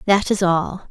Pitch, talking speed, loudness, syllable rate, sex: 185 Hz, 200 wpm, -18 LUFS, 4.2 syllables/s, female